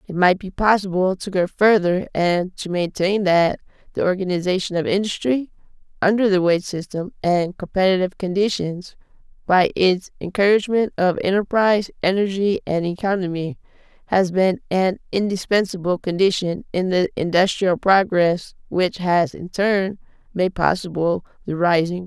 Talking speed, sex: 135 wpm, female